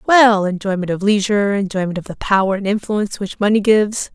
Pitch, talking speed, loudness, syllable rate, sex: 200 Hz, 175 wpm, -17 LUFS, 6.0 syllables/s, female